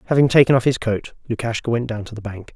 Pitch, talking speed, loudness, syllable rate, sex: 115 Hz, 260 wpm, -19 LUFS, 6.8 syllables/s, male